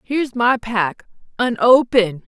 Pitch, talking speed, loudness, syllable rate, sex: 230 Hz, 100 wpm, -17 LUFS, 4.4 syllables/s, female